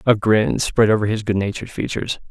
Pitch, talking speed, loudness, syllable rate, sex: 105 Hz, 180 wpm, -19 LUFS, 6.1 syllables/s, male